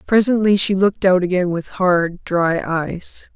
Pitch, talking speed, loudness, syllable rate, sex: 185 Hz, 160 wpm, -17 LUFS, 4.1 syllables/s, female